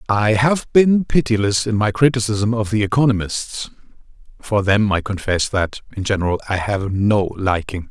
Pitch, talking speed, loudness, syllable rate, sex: 105 Hz, 160 wpm, -18 LUFS, 4.7 syllables/s, male